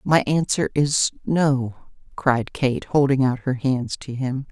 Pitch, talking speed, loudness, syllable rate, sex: 135 Hz, 160 wpm, -21 LUFS, 3.7 syllables/s, female